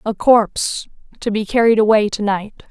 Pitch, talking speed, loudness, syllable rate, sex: 215 Hz, 175 wpm, -16 LUFS, 5.1 syllables/s, female